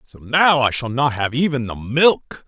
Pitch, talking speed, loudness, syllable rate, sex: 130 Hz, 220 wpm, -18 LUFS, 4.3 syllables/s, male